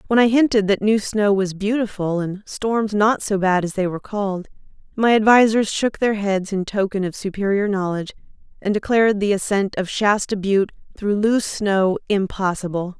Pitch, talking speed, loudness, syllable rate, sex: 205 Hz, 175 wpm, -20 LUFS, 5.2 syllables/s, female